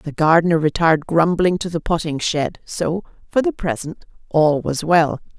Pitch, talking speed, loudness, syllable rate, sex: 165 Hz, 165 wpm, -19 LUFS, 4.7 syllables/s, female